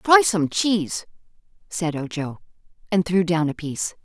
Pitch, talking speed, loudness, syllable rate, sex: 180 Hz, 150 wpm, -22 LUFS, 4.6 syllables/s, female